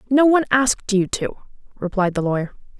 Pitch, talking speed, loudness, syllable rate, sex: 220 Hz, 170 wpm, -19 LUFS, 6.3 syllables/s, female